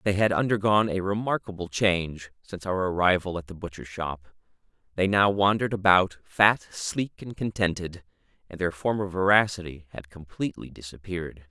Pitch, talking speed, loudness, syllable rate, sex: 95 Hz, 145 wpm, -25 LUFS, 5.3 syllables/s, male